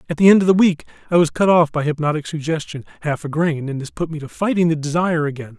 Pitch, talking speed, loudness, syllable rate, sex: 160 Hz, 270 wpm, -18 LUFS, 6.7 syllables/s, male